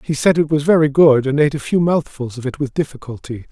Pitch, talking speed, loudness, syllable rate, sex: 145 Hz, 255 wpm, -16 LUFS, 6.2 syllables/s, male